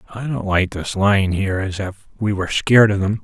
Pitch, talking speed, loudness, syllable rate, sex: 100 Hz, 240 wpm, -18 LUFS, 5.8 syllables/s, male